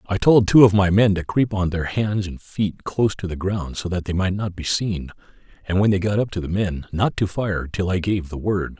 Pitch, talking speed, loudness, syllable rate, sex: 95 Hz, 275 wpm, -21 LUFS, 5.1 syllables/s, male